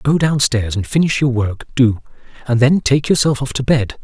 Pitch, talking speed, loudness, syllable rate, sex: 130 Hz, 225 wpm, -16 LUFS, 4.9 syllables/s, male